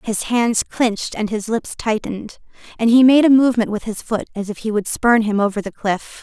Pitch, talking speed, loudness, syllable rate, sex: 220 Hz, 230 wpm, -18 LUFS, 5.4 syllables/s, female